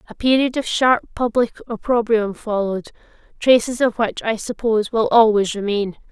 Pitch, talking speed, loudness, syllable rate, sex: 225 Hz, 145 wpm, -19 LUFS, 5.0 syllables/s, female